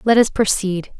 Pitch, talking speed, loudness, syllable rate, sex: 200 Hz, 180 wpm, -17 LUFS, 4.7 syllables/s, female